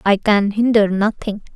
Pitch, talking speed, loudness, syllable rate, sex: 205 Hz, 155 wpm, -16 LUFS, 4.5 syllables/s, female